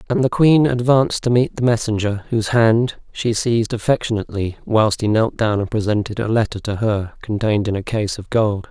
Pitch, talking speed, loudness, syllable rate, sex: 110 Hz, 200 wpm, -18 LUFS, 5.5 syllables/s, male